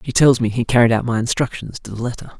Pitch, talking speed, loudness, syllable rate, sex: 120 Hz, 275 wpm, -18 LUFS, 6.6 syllables/s, male